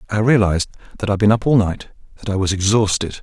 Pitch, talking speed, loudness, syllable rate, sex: 105 Hz, 225 wpm, -17 LUFS, 6.5 syllables/s, male